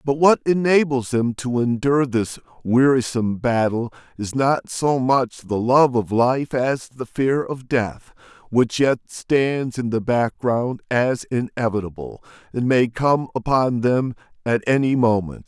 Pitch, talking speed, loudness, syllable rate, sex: 125 Hz, 145 wpm, -20 LUFS, 4.0 syllables/s, male